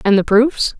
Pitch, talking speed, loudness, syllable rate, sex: 230 Hz, 225 wpm, -14 LUFS, 4.4 syllables/s, female